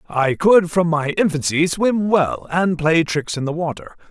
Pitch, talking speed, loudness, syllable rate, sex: 165 Hz, 190 wpm, -18 LUFS, 4.3 syllables/s, male